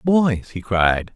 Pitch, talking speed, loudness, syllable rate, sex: 115 Hz, 155 wpm, -19 LUFS, 2.9 syllables/s, male